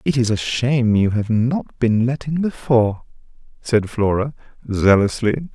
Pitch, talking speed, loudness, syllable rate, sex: 120 Hz, 150 wpm, -19 LUFS, 4.6 syllables/s, male